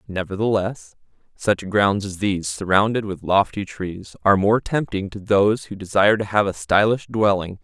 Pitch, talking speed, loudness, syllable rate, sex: 100 Hz, 165 wpm, -20 LUFS, 5.0 syllables/s, male